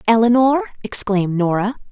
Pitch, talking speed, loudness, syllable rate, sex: 225 Hz, 95 wpm, -17 LUFS, 5.4 syllables/s, female